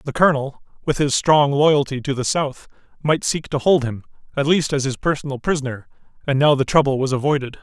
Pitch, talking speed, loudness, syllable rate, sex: 140 Hz, 205 wpm, -19 LUFS, 5.8 syllables/s, male